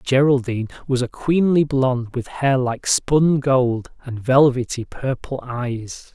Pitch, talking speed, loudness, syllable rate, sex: 130 Hz, 135 wpm, -20 LUFS, 3.9 syllables/s, male